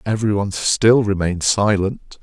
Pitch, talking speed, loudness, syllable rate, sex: 100 Hz, 135 wpm, -17 LUFS, 5.2 syllables/s, male